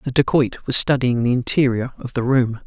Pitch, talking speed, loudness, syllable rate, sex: 125 Hz, 205 wpm, -19 LUFS, 5.4 syllables/s, male